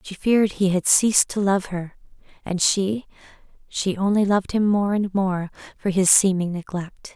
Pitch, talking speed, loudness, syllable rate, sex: 195 Hz, 170 wpm, -21 LUFS, 4.7 syllables/s, female